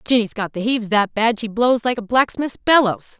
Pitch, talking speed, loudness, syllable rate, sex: 225 Hz, 225 wpm, -18 LUFS, 5.2 syllables/s, female